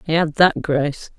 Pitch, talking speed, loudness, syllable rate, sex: 155 Hz, 200 wpm, -18 LUFS, 4.8 syllables/s, female